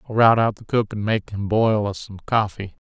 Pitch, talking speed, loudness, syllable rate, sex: 105 Hz, 250 wpm, -21 LUFS, 5.0 syllables/s, male